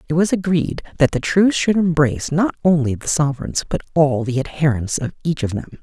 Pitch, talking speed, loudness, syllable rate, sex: 155 Hz, 205 wpm, -18 LUFS, 5.7 syllables/s, male